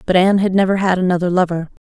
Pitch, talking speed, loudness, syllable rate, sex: 185 Hz, 225 wpm, -16 LUFS, 7.6 syllables/s, female